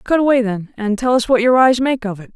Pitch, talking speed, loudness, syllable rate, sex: 235 Hz, 305 wpm, -15 LUFS, 5.9 syllables/s, female